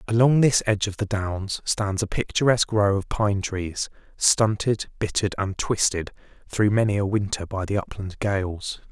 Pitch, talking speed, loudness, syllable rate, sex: 100 Hz, 170 wpm, -23 LUFS, 4.7 syllables/s, male